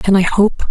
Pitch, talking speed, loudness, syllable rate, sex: 195 Hz, 255 wpm, -14 LUFS, 4.7 syllables/s, female